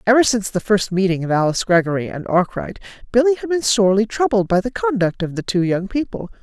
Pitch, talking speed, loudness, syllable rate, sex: 205 Hz, 215 wpm, -18 LUFS, 6.3 syllables/s, female